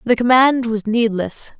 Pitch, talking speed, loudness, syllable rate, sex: 235 Hz, 150 wpm, -16 LUFS, 4.2 syllables/s, female